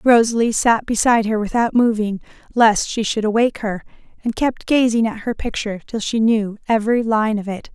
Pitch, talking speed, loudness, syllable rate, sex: 225 Hz, 185 wpm, -18 LUFS, 5.5 syllables/s, female